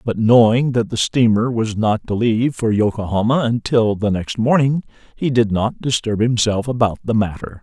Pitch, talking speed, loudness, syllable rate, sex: 115 Hz, 180 wpm, -17 LUFS, 4.9 syllables/s, male